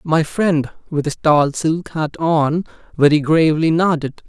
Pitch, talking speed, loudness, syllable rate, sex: 155 Hz, 155 wpm, -17 LUFS, 4.2 syllables/s, male